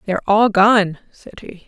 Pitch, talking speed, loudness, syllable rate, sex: 200 Hz, 180 wpm, -15 LUFS, 4.6 syllables/s, female